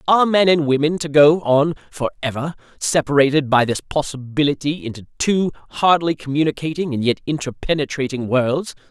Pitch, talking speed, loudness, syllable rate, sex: 145 Hz, 135 wpm, -18 LUFS, 5.5 syllables/s, male